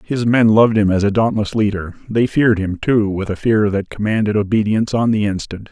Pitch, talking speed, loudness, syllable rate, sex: 105 Hz, 220 wpm, -16 LUFS, 5.7 syllables/s, male